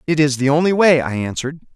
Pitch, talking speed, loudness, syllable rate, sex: 150 Hz, 240 wpm, -16 LUFS, 6.4 syllables/s, male